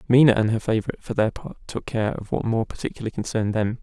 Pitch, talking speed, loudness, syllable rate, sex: 115 Hz, 235 wpm, -23 LUFS, 7.1 syllables/s, male